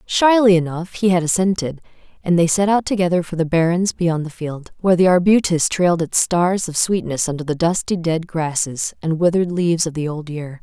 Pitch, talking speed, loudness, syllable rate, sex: 170 Hz, 205 wpm, -18 LUFS, 5.4 syllables/s, female